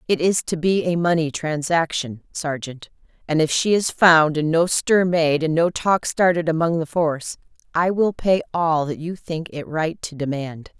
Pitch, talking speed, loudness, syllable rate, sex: 160 Hz, 195 wpm, -20 LUFS, 4.5 syllables/s, female